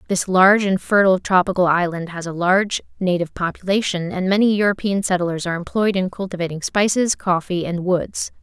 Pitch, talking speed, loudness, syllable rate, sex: 185 Hz, 165 wpm, -19 LUFS, 5.8 syllables/s, female